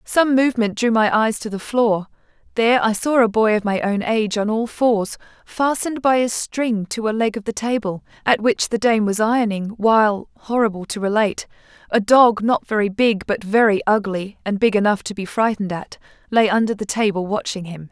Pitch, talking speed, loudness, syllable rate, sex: 215 Hz, 200 wpm, -19 LUFS, 5.4 syllables/s, female